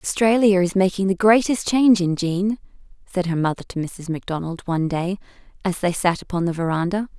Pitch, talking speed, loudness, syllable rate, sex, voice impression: 185 Hz, 185 wpm, -21 LUFS, 5.8 syllables/s, female, feminine, adult-like, clear, fluent, raspy, calm, elegant, slightly strict, sharp